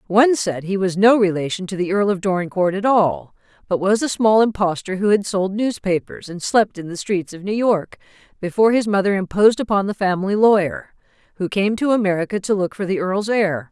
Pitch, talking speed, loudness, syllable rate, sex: 195 Hz, 210 wpm, -19 LUFS, 5.6 syllables/s, female